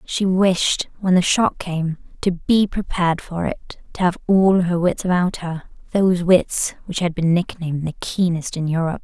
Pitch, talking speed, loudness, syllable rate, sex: 175 Hz, 180 wpm, -20 LUFS, 4.6 syllables/s, female